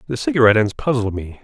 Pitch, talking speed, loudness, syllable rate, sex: 120 Hz, 210 wpm, -17 LUFS, 7.2 syllables/s, male